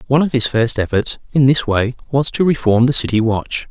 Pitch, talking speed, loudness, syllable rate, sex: 125 Hz, 225 wpm, -16 LUFS, 5.5 syllables/s, male